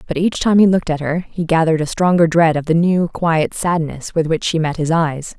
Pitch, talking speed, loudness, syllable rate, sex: 165 Hz, 255 wpm, -16 LUFS, 5.4 syllables/s, female